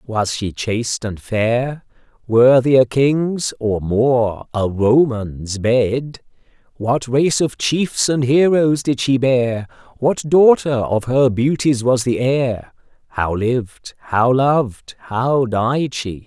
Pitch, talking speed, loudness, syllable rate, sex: 125 Hz, 120 wpm, -17 LUFS, 3.2 syllables/s, male